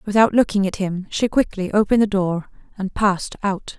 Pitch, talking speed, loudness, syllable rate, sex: 200 Hz, 190 wpm, -20 LUFS, 5.4 syllables/s, female